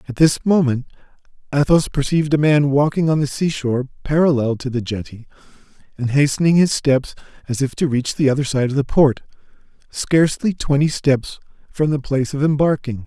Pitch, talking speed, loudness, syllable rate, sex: 140 Hz, 170 wpm, -18 LUFS, 5.6 syllables/s, male